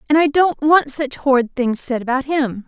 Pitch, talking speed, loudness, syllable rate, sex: 275 Hz, 225 wpm, -17 LUFS, 4.8 syllables/s, female